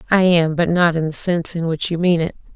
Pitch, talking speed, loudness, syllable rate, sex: 170 Hz, 260 wpm, -18 LUFS, 6.0 syllables/s, female